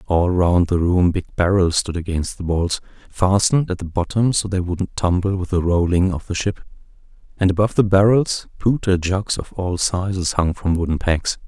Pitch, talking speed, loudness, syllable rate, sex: 95 Hz, 195 wpm, -19 LUFS, 4.9 syllables/s, male